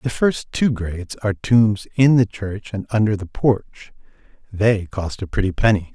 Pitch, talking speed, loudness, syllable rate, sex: 105 Hz, 180 wpm, -20 LUFS, 4.5 syllables/s, male